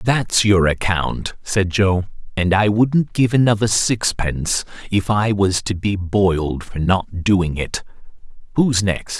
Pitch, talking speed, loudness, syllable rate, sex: 100 Hz, 150 wpm, -18 LUFS, 3.7 syllables/s, male